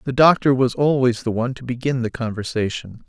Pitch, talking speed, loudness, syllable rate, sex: 125 Hz, 195 wpm, -20 LUFS, 5.8 syllables/s, male